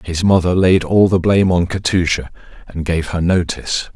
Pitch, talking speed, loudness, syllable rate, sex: 85 Hz, 180 wpm, -15 LUFS, 5.3 syllables/s, male